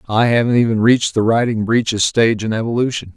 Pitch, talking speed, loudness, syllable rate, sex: 115 Hz, 190 wpm, -16 LUFS, 6.4 syllables/s, male